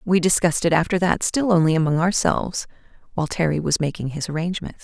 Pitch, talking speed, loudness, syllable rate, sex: 170 Hz, 185 wpm, -21 LUFS, 6.6 syllables/s, female